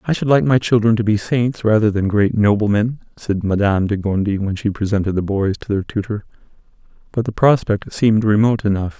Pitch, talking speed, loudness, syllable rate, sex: 105 Hz, 200 wpm, -17 LUFS, 5.7 syllables/s, male